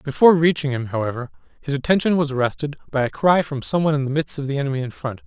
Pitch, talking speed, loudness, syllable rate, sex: 140 Hz, 250 wpm, -20 LUFS, 7.1 syllables/s, male